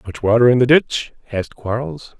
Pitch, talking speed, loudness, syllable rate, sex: 115 Hz, 190 wpm, -17 LUFS, 5.3 syllables/s, male